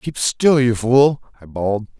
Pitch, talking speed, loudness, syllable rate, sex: 125 Hz, 180 wpm, -17 LUFS, 4.2 syllables/s, male